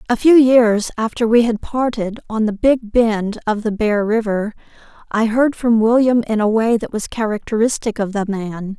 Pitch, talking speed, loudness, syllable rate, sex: 225 Hz, 190 wpm, -17 LUFS, 4.6 syllables/s, female